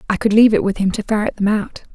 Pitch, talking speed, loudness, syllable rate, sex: 215 Hz, 310 wpm, -16 LUFS, 7.3 syllables/s, female